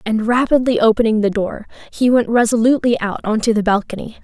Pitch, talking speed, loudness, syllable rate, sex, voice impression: 225 Hz, 170 wpm, -16 LUFS, 6.0 syllables/s, female, feminine, slightly adult-like, slightly cute, friendly, slightly sweet, kind